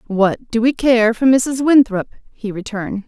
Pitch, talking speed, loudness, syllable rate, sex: 230 Hz, 175 wpm, -16 LUFS, 4.5 syllables/s, female